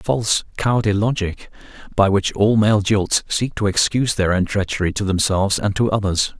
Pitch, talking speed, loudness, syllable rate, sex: 100 Hz, 180 wpm, -18 LUFS, 5.3 syllables/s, male